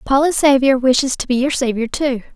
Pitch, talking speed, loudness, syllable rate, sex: 265 Hz, 205 wpm, -16 LUFS, 5.7 syllables/s, female